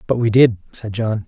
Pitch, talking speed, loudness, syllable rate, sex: 110 Hz, 235 wpm, -17 LUFS, 5.2 syllables/s, male